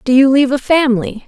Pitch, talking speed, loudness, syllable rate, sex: 260 Hz, 235 wpm, -12 LUFS, 6.8 syllables/s, female